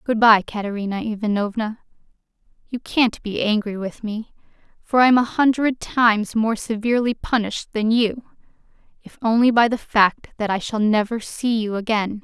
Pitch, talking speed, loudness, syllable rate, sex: 220 Hz, 160 wpm, -20 LUFS, 5.0 syllables/s, female